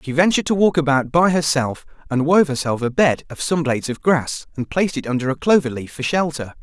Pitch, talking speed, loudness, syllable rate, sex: 150 Hz, 235 wpm, -19 LUFS, 5.9 syllables/s, male